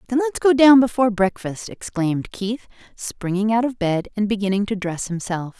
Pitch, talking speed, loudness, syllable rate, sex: 215 Hz, 180 wpm, -20 LUFS, 5.2 syllables/s, female